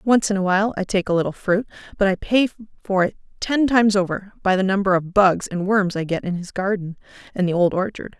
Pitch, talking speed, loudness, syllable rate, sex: 195 Hz, 240 wpm, -20 LUFS, 6.1 syllables/s, female